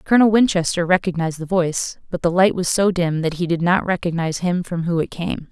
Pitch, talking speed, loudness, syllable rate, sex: 175 Hz, 230 wpm, -19 LUFS, 6.1 syllables/s, female